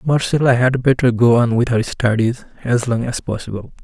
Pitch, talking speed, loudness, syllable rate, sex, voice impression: 120 Hz, 190 wpm, -17 LUFS, 5.2 syllables/s, male, masculine, adult-like, relaxed, slightly weak, clear, halting, slightly nasal, intellectual, calm, friendly, reassuring, slightly wild, slightly lively, modest